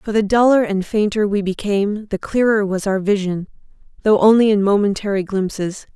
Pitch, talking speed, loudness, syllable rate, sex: 205 Hz, 170 wpm, -17 LUFS, 5.3 syllables/s, female